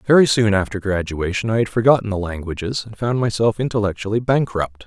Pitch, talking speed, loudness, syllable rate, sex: 105 Hz, 175 wpm, -19 LUFS, 5.9 syllables/s, male